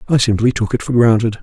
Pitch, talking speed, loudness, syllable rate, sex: 115 Hz, 250 wpm, -15 LUFS, 6.6 syllables/s, male